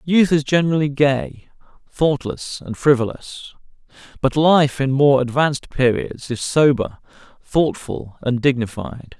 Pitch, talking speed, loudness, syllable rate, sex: 140 Hz, 115 wpm, -18 LUFS, 4.1 syllables/s, male